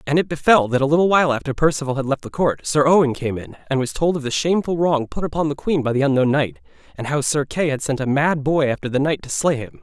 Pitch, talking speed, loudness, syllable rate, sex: 145 Hz, 285 wpm, -19 LUFS, 6.4 syllables/s, male